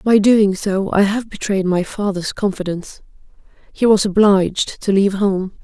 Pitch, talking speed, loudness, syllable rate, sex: 200 Hz, 150 wpm, -17 LUFS, 4.7 syllables/s, female